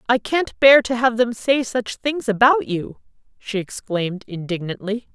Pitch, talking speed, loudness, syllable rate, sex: 230 Hz, 165 wpm, -19 LUFS, 4.4 syllables/s, female